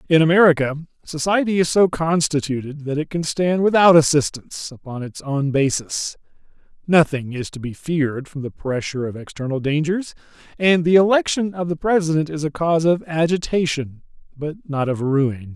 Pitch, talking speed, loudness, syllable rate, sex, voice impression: 155 Hz, 160 wpm, -19 LUFS, 5.2 syllables/s, male, very masculine, middle-aged, thick, slightly muffled, sincere, friendly